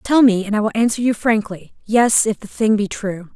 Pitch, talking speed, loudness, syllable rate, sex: 215 Hz, 250 wpm, -17 LUFS, 5.0 syllables/s, female